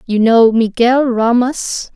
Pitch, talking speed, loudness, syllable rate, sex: 235 Hz, 125 wpm, -13 LUFS, 3.3 syllables/s, female